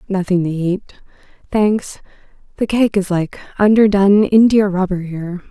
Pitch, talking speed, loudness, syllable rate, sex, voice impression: 195 Hz, 120 wpm, -15 LUFS, 5.0 syllables/s, female, feminine, adult-like, slightly relaxed, slightly bright, soft, slightly muffled, intellectual, calm, friendly, reassuring, elegant, kind, slightly modest